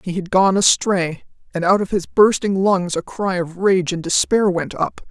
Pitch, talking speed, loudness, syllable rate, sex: 185 Hz, 210 wpm, -18 LUFS, 4.5 syllables/s, female